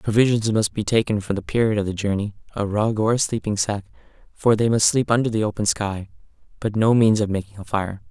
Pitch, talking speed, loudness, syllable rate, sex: 105 Hz, 205 wpm, -21 LUFS, 5.7 syllables/s, male